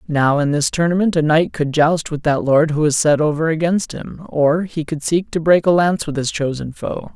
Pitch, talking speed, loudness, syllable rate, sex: 155 Hz, 245 wpm, -17 LUFS, 5.1 syllables/s, male